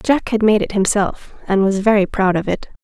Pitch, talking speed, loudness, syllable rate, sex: 205 Hz, 230 wpm, -17 LUFS, 5.1 syllables/s, female